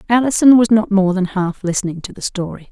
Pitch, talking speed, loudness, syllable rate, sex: 200 Hz, 220 wpm, -15 LUFS, 6.0 syllables/s, female